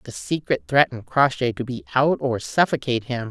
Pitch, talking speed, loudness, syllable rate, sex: 130 Hz, 180 wpm, -22 LUFS, 5.5 syllables/s, female